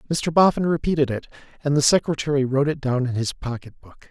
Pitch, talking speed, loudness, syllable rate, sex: 140 Hz, 205 wpm, -21 LUFS, 6.2 syllables/s, male